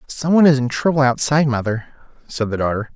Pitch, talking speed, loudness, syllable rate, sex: 130 Hz, 205 wpm, -17 LUFS, 6.6 syllables/s, male